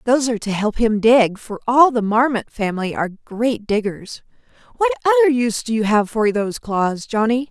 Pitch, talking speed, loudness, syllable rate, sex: 225 Hz, 190 wpm, -18 LUFS, 5.6 syllables/s, female